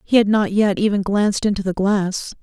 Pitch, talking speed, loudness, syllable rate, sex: 200 Hz, 220 wpm, -18 LUFS, 5.3 syllables/s, female